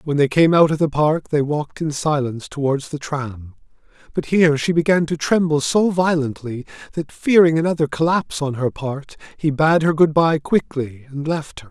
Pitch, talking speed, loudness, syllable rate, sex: 150 Hz, 195 wpm, -19 LUFS, 5.1 syllables/s, male